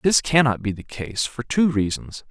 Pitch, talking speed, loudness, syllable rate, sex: 120 Hz, 235 wpm, -22 LUFS, 5.0 syllables/s, male